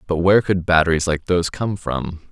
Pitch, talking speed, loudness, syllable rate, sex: 85 Hz, 205 wpm, -19 LUFS, 5.7 syllables/s, male